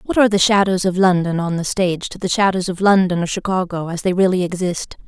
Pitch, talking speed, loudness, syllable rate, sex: 185 Hz, 235 wpm, -17 LUFS, 6.1 syllables/s, female